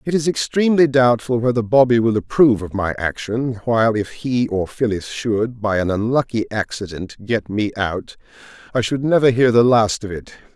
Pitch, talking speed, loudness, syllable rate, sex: 115 Hz, 180 wpm, -18 LUFS, 5.0 syllables/s, male